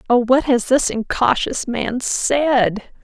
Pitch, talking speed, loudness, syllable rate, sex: 245 Hz, 140 wpm, -18 LUFS, 3.3 syllables/s, female